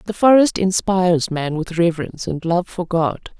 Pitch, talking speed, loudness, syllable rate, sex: 175 Hz, 175 wpm, -18 LUFS, 5.0 syllables/s, female